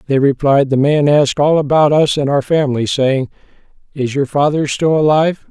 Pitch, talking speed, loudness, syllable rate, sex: 145 Hz, 185 wpm, -14 LUFS, 5.4 syllables/s, male